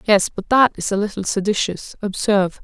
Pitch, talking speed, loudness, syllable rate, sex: 200 Hz, 180 wpm, -19 LUFS, 5.3 syllables/s, female